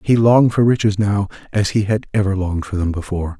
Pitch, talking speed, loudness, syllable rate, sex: 100 Hz, 230 wpm, -17 LUFS, 6.4 syllables/s, male